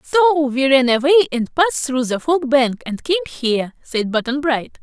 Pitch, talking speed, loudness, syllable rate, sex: 275 Hz, 200 wpm, -17 LUFS, 4.7 syllables/s, female